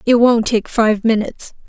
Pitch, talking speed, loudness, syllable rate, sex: 225 Hz, 180 wpm, -15 LUFS, 4.8 syllables/s, female